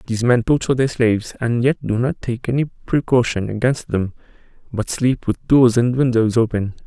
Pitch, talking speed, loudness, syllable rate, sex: 120 Hz, 185 wpm, -18 LUFS, 5.2 syllables/s, male